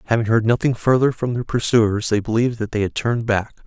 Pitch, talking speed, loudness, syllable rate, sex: 115 Hz, 230 wpm, -19 LUFS, 6.2 syllables/s, male